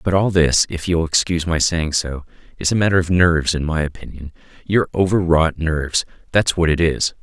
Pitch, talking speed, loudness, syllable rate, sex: 85 Hz, 200 wpm, -18 LUFS, 5.4 syllables/s, male